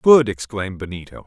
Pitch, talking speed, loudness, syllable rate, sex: 105 Hz, 145 wpm, -20 LUFS, 5.7 syllables/s, male